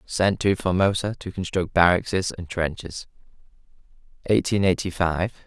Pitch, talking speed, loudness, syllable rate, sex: 90 Hz, 120 wpm, -23 LUFS, 4.7 syllables/s, male